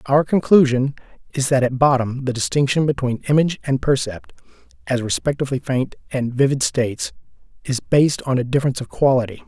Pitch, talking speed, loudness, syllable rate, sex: 135 Hz, 160 wpm, -19 LUFS, 6.0 syllables/s, male